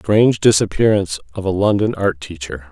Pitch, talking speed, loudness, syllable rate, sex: 95 Hz, 155 wpm, -16 LUFS, 5.6 syllables/s, male